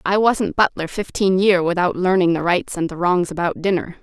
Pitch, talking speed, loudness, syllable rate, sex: 180 Hz, 210 wpm, -19 LUFS, 5.1 syllables/s, female